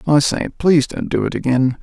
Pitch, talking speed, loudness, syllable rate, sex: 140 Hz, 230 wpm, -17 LUFS, 5.4 syllables/s, male